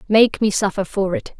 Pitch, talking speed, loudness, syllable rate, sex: 205 Hz, 215 wpm, -19 LUFS, 4.9 syllables/s, female